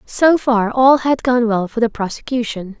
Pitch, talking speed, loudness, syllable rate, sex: 235 Hz, 195 wpm, -16 LUFS, 4.5 syllables/s, female